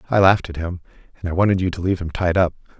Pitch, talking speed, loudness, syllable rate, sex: 90 Hz, 280 wpm, -20 LUFS, 8.2 syllables/s, male